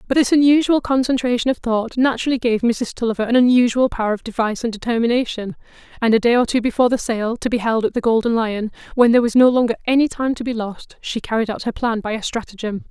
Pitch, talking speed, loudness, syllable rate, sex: 235 Hz, 230 wpm, -18 LUFS, 6.6 syllables/s, female